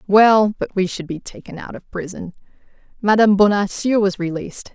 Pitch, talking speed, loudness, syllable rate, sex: 195 Hz, 165 wpm, -18 LUFS, 5.5 syllables/s, female